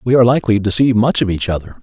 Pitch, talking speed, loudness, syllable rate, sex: 115 Hz, 295 wpm, -14 LUFS, 7.6 syllables/s, male